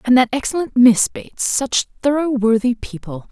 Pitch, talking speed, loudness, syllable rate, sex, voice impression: 245 Hz, 145 wpm, -17 LUFS, 5.0 syllables/s, female, very feminine, slightly adult-like, thin, tensed, powerful, bright, slightly soft, clear, fluent, slightly cute, cool, intellectual, very refreshing, sincere, slightly calm, slightly friendly, slightly reassuring, unique, slightly elegant, very wild, sweet, slightly lively, slightly strict, slightly intense, light